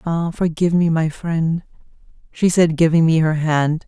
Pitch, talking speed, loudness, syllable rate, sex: 165 Hz, 155 wpm, -18 LUFS, 5.1 syllables/s, female